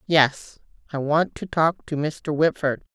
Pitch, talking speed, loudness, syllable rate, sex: 150 Hz, 165 wpm, -23 LUFS, 3.8 syllables/s, female